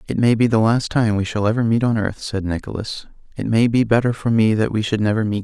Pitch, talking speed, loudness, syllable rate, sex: 110 Hz, 285 wpm, -19 LUFS, 6.2 syllables/s, male